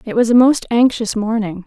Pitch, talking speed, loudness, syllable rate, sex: 225 Hz, 215 wpm, -15 LUFS, 5.3 syllables/s, female